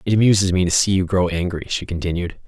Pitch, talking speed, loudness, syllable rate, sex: 90 Hz, 240 wpm, -19 LUFS, 6.6 syllables/s, male